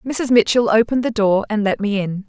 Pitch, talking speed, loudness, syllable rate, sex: 220 Hz, 235 wpm, -17 LUFS, 5.7 syllables/s, female